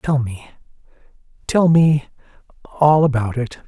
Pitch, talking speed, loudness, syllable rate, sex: 140 Hz, 80 wpm, -17 LUFS, 3.8 syllables/s, male